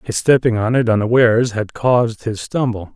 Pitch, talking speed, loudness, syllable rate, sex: 115 Hz, 180 wpm, -16 LUFS, 5.3 syllables/s, male